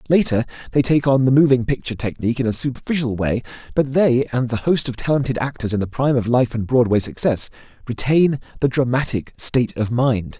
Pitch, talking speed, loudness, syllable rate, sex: 125 Hz, 195 wpm, -19 LUFS, 6.0 syllables/s, male